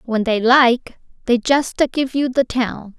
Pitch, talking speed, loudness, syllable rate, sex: 245 Hz, 200 wpm, -17 LUFS, 3.9 syllables/s, female